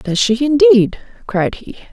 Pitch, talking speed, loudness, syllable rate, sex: 240 Hz, 155 wpm, -14 LUFS, 4.1 syllables/s, female